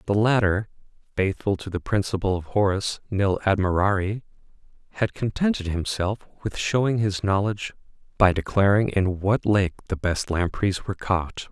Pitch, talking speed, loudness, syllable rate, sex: 100 Hz, 140 wpm, -24 LUFS, 4.9 syllables/s, male